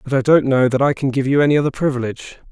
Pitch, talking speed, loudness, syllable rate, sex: 135 Hz, 285 wpm, -17 LUFS, 7.4 syllables/s, male